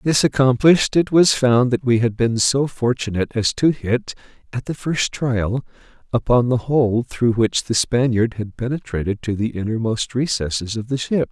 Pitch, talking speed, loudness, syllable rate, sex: 120 Hz, 180 wpm, -19 LUFS, 4.7 syllables/s, male